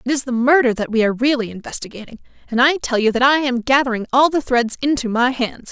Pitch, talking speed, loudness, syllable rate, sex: 250 Hz, 240 wpm, -17 LUFS, 6.4 syllables/s, female